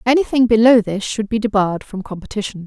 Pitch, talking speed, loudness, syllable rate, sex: 215 Hz, 180 wpm, -16 LUFS, 6.3 syllables/s, female